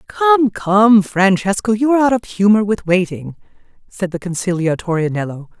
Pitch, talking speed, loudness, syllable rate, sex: 200 Hz, 150 wpm, -15 LUFS, 5.0 syllables/s, female